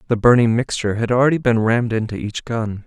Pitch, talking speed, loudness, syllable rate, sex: 115 Hz, 210 wpm, -18 LUFS, 6.4 syllables/s, male